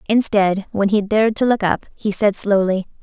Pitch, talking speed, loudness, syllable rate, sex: 205 Hz, 200 wpm, -18 LUFS, 5.0 syllables/s, female